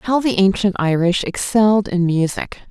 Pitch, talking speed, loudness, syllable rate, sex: 195 Hz, 155 wpm, -17 LUFS, 4.7 syllables/s, female